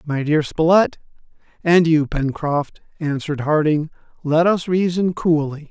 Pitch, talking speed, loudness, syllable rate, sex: 160 Hz, 125 wpm, -19 LUFS, 4.2 syllables/s, male